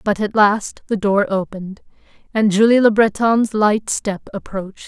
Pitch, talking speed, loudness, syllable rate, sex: 210 Hz, 160 wpm, -17 LUFS, 4.7 syllables/s, female